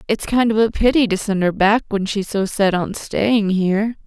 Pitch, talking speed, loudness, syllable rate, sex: 205 Hz, 235 wpm, -18 LUFS, 4.8 syllables/s, female